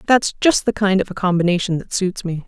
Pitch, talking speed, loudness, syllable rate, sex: 190 Hz, 245 wpm, -18 LUFS, 5.8 syllables/s, female